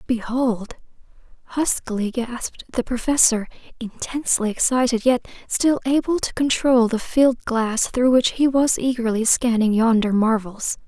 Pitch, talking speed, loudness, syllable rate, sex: 240 Hz, 125 wpm, -20 LUFS, 4.5 syllables/s, female